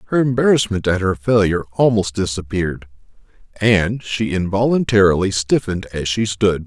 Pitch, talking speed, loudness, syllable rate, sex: 100 Hz, 125 wpm, -17 LUFS, 5.3 syllables/s, male